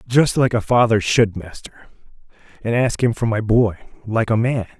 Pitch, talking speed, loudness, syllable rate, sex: 115 Hz, 190 wpm, -18 LUFS, 4.9 syllables/s, male